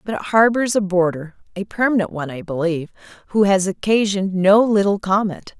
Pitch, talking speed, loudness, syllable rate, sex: 195 Hz, 170 wpm, -18 LUFS, 5.7 syllables/s, female